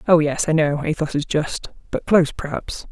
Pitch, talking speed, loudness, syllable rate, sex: 155 Hz, 205 wpm, -21 LUFS, 5.2 syllables/s, female